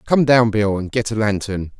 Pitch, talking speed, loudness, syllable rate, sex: 110 Hz, 235 wpm, -18 LUFS, 5.5 syllables/s, male